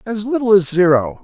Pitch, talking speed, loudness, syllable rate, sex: 190 Hz, 195 wpm, -15 LUFS, 5.4 syllables/s, male